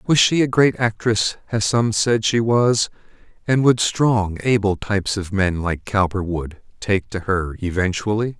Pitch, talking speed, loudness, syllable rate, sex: 105 Hz, 155 wpm, -19 LUFS, 4.2 syllables/s, male